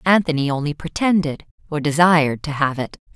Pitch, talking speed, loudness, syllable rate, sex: 155 Hz, 150 wpm, -19 LUFS, 5.7 syllables/s, female